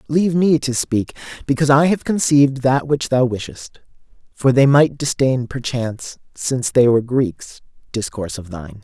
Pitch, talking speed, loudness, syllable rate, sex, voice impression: 130 Hz, 165 wpm, -17 LUFS, 5.2 syllables/s, male, masculine, adult-like, slightly thick, refreshing, sincere